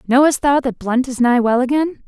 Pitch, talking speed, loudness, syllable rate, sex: 255 Hz, 230 wpm, -16 LUFS, 5.2 syllables/s, female